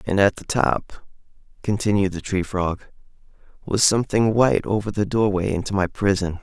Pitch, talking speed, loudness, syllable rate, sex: 100 Hz, 160 wpm, -21 LUFS, 5.3 syllables/s, male